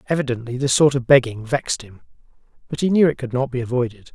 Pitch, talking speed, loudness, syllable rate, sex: 130 Hz, 215 wpm, -20 LUFS, 6.7 syllables/s, male